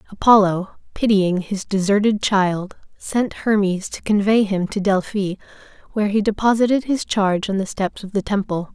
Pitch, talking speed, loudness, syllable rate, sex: 200 Hz, 160 wpm, -19 LUFS, 5.0 syllables/s, female